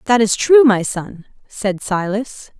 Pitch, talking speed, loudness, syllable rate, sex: 215 Hz, 160 wpm, -16 LUFS, 3.7 syllables/s, female